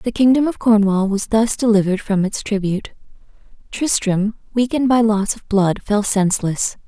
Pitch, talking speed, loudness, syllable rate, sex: 210 Hz, 155 wpm, -17 LUFS, 5.1 syllables/s, female